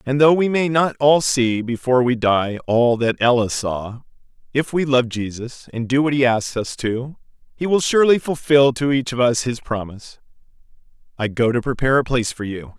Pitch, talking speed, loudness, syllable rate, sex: 130 Hz, 200 wpm, -19 LUFS, 5.1 syllables/s, male